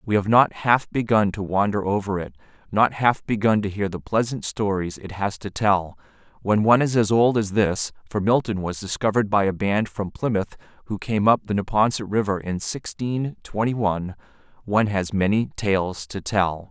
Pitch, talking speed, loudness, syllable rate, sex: 105 Hz, 185 wpm, -22 LUFS, 4.9 syllables/s, male